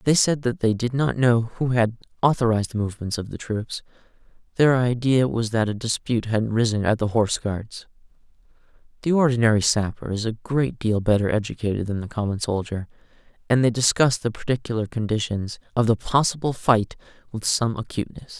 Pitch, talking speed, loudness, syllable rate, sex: 115 Hz, 175 wpm, -23 LUFS, 5.7 syllables/s, male